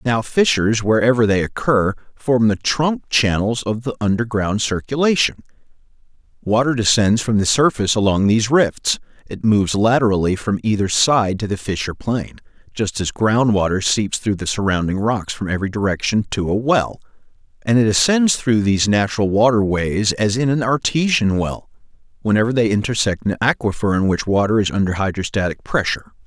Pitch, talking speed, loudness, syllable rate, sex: 110 Hz, 160 wpm, -18 LUFS, 5.4 syllables/s, male